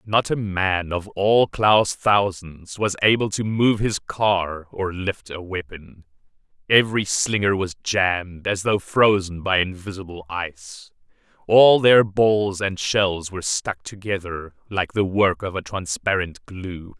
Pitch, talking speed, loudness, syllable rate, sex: 95 Hz, 150 wpm, -21 LUFS, 3.8 syllables/s, male